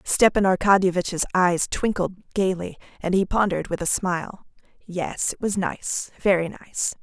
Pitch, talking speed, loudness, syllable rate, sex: 185 Hz, 145 wpm, -23 LUFS, 4.6 syllables/s, female